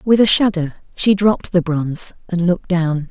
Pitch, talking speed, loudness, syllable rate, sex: 180 Hz, 195 wpm, -17 LUFS, 5.1 syllables/s, female